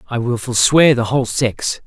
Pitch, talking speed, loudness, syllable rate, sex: 125 Hz, 195 wpm, -15 LUFS, 4.7 syllables/s, male